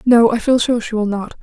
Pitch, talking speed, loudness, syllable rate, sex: 230 Hz, 295 wpm, -16 LUFS, 5.4 syllables/s, female